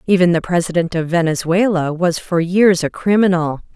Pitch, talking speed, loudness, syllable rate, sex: 175 Hz, 160 wpm, -16 LUFS, 5.1 syllables/s, female